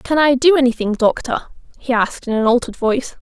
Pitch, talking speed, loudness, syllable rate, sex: 255 Hz, 200 wpm, -17 LUFS, 6.3 syllables/s, female